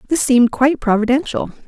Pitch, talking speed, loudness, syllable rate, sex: 260 Hz, 145 wpm, -16 LUFS, 6.9 syllables/s, female